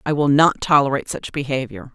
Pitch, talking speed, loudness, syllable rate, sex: 140 Hz, 185 wpm, -18 LUFS, 6.3 syllables/s, female